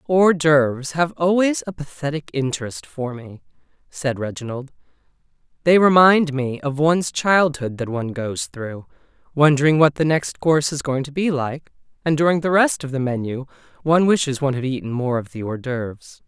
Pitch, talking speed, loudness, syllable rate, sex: 145 Hz, 175 wpm, -20 LUFS, 5.2 syllables/s, male